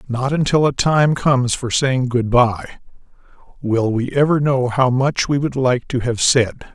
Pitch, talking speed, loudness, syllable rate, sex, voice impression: 130 Hz, 185 wpm, -17 LUFS, 4.3 syllables/s, male, masculine, middle-aged, tensed, powerful, hard, muffled, raspy, mature, slightly friendly, wild, lively, strict, intense, slightly sharp